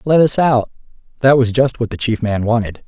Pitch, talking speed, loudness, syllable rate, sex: 120 Hz, 230 wpm, -15 LUFS, 5.3 syllables/s, male